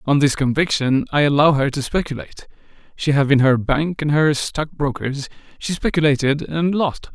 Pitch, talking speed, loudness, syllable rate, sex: 145 Hz, 160 wpm, -18 LUFS, 5.2 syllables/s, male